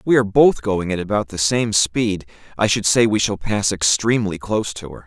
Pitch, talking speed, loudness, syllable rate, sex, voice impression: 105 Hz, 235 wpm, -18 LUFS, 5.5 syllables/s, male, masculine, middle-aged, slightly thick, tensed, slightly powerful, cool, wild, slightly intense